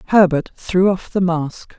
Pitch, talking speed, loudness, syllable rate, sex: 180 Hz, 170 wpm, -17 LUFS, 4.0 syllables/s, female